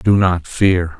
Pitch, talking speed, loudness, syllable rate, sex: 90 Hz, 180 wpm, -16 LUFS, 3.3 syllables/s, male